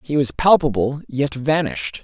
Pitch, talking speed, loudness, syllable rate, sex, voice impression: 135 Hz, 145 wpm, -19 LUFS, 4.8 syllables/s, male, masculine, middle-aged, thick, tensed, powerful, bright, raspy, mature, friendly, wild, lively, slightly strict, intense